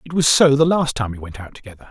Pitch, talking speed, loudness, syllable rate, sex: 130 Hz, 315 wpm, -16 LUFS, 6.6 syllables/s, male